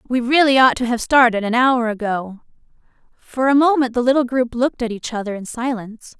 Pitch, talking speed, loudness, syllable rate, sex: 245 Hz, 205 wpm, -17 LUFS, 5.6 syllables/s, female